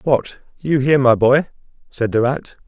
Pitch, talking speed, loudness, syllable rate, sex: 130 Hz, 180 wpm, -17 LUFS, 4.6 syllables/s, male